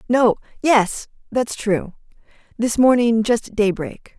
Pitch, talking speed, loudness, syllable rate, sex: 225 Hz, 85 wpm, -19 LUFS, 3.7 syllables/s, female